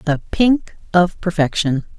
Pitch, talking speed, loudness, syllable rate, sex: 180 Hz, 120 wpm, -18 LUFS, 3.8 syllables/s, female